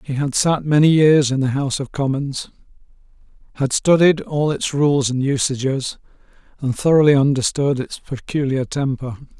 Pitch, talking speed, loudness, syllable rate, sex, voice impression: 140 Hz, 145 wpm, -18 LUFS, 4.8 syllables/s, male, very masculine, very adult-like, slightly old, thick, slightly tensed, slightly weak, slightly dark, slightly hard, slightly muffled, fluent, slightly raspy, cool, intellectual, sincere, very calm, very mature, friendly, very reassuring, very unique, elegant, wild, sweet, slightly lively, kind, modest